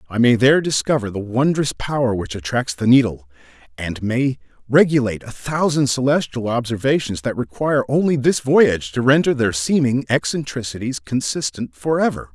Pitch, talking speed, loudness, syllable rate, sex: 125 Hz, 145 wpm, -19 LUFS, 5.3 syllables/s, male